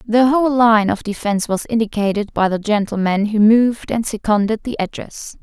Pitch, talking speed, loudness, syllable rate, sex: 215 Hz, 175 wpm, -17 LUFS, 5.3 syllables/s, female